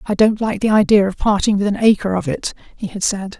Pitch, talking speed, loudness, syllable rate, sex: 205 Hz, 265 wpm, -16 LUFS, 5.8 syllables/s, female